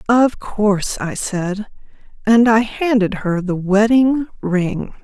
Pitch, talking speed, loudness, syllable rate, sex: 210 Hz, 130 wpm, -17 LUFS, 3.4 syllables/s, female